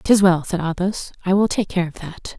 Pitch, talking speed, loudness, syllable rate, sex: 185 Hz, 250 wpm, -20 LUFS, 5.1 syllables/s, female